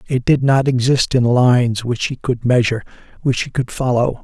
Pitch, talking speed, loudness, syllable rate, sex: 125 Hz, 200 wpm, -16 LUFS, 5.2 syllables/s, male